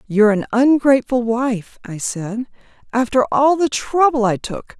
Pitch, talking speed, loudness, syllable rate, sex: 245 Hz, 150 wpm, -17 LUFS, 4.5 syllables/s, female